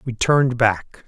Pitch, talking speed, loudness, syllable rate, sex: 120 Hz, 165 wpm, -18 LUFS, 4.3 syllables/s, male